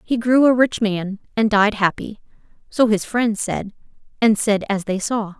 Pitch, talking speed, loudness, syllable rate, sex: 215 Hz, 180 wpm, -19 LUFS, 4.4 syllables/s, female